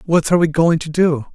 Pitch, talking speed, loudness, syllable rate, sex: 165 Hz, 270 wpm, -16 LUFS, 6.1 syllables/s, male